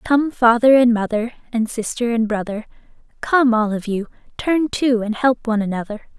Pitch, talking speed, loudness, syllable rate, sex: 235 Hz, 175 wpm, -18 LUFS, 5.1 syllables/s, female